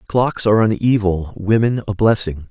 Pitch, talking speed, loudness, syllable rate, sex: 105 Hz, 170 wpm, -17 LUFS, 4.8 syllables/s, male